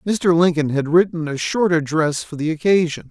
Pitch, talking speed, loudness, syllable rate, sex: 165 Hz, 195 wpm, -18 LUFS, 5.1 syllables/s, male